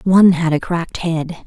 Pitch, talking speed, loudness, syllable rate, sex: 170 Hz, 205 wpm, -16 LUFS, 5.1 syllables/s, female